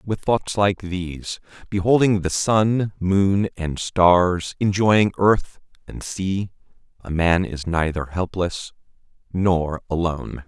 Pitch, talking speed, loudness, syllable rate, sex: 95 Hz, 120 wpm, -21 LUFS, 3.4 syllables/s, male